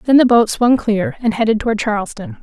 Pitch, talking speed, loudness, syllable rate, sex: 225 Hz, 225 wpm, -15 LUFS, 5.8 syllables/s, female